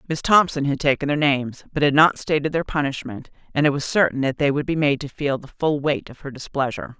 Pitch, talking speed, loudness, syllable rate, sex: 145 Hz, 250 wpm, -21 LUFS, 6.0 syllables/s, female